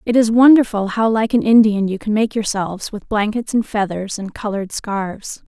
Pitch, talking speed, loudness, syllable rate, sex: 215 Hz, 195 wpm, -17 LUFS, 5.2 syllables/s, female